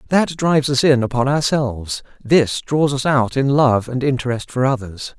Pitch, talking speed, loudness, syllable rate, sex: 130 Hz, 185 wpm, -18 LUFS, 4.8 syllables/s, male